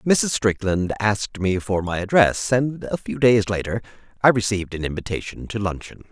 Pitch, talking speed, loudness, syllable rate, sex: 105 Hz, 175 wpm, -21 LUFS, 5.0 syllables/s, male